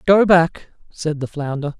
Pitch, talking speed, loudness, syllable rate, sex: 160 Hz, 170 wpm, -18 LUFS, 4.0 syllables/s, male